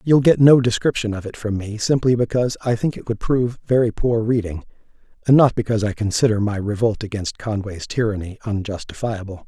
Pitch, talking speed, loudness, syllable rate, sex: 110 Hz, 185 wpm, -20 LUFS, 5.8 syllables/s, male